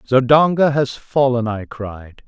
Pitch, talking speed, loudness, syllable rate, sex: 125 Hz, 130 wpm, -16 LUFS, 3.8 syllables/s, male